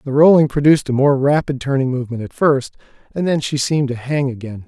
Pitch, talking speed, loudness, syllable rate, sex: 135 Hz, 220 wpm, -16 LUFS, 6.2 syllables/s, male